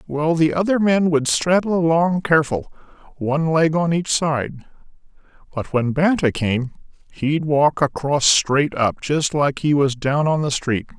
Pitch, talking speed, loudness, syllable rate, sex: 150 Hz, 165 wpm, -19 LUFS, 4.2 syllables/s, male